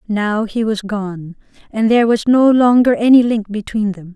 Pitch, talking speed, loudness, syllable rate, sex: 220 Hz, 190 wpm, -14 LUFS, 4.6 syllables/s, female